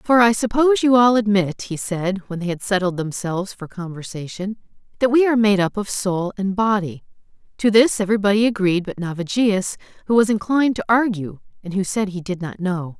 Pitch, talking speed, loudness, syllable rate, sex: 200 Hz, 195 wpm, -19 LUFS, 5.6 syllables/s, female